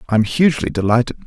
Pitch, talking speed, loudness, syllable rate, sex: 120 Hz, 190 wpm, -17 LUFS, 7.7 syllables/s, male